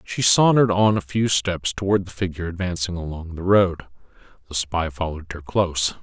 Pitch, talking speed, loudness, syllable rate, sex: 90 Hz, 180 wpm, -21 LUFS, 5.7 syllables/s, male